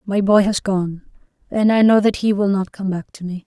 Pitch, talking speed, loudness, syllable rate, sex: 200 Hz, 260 wpm, -18 LUFS, 5.1 syllables/s, female